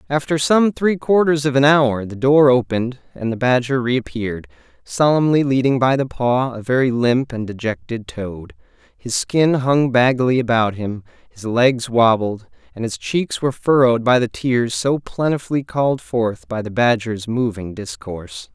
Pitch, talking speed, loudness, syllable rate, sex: 125 Hz, 165 wpm, -18 LUFS, 4.7 syllables/s, male